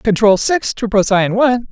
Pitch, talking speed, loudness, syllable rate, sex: 220 Hz, 175 wpm, -14 LUFS, 4.8 syllables/s, female